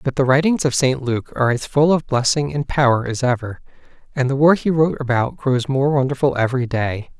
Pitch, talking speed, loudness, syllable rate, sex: 135 Hz, 215 wpm, -18 LUFS, 5.7 syllables/s, male